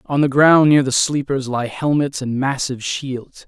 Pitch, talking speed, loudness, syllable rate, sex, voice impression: 135 Hz, 190 wpm, -17 LUFS, 4.5 syllables/s, male, masculine, adult-like, slightly middle-aged, slightly thick, slightly tensed, slightly powerful, slightly dark, slightly hard, slightly clear, slightly fluent, slightly cool, slightly intellectual, slightly sincere, calm, slightly mature, slightly friendly, slightly reassuring, slightly wild, slightly sweet, kind, slightly modest